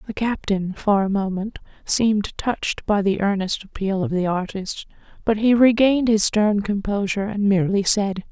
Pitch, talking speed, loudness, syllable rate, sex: 205 Hz, 165 wpm, -21 LUFS, 5.0 syllables/s, female